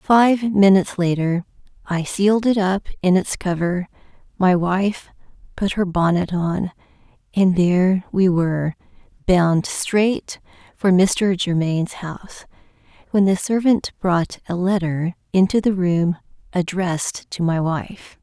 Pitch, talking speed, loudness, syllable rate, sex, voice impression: 185 Hz, 130 wpm, -19 LUFS, 4.0 syllables/s, female, very feminine, adult-like, thin, slightly relaxed, slightly weak, slightly dark, soft, clear, fluent, very cute, intellectual, refreshing, very sincere, calm, friendly, very reassuring, very unique, very elegant, slightly wild, very sweet, slightly lively, very kind, very modest, light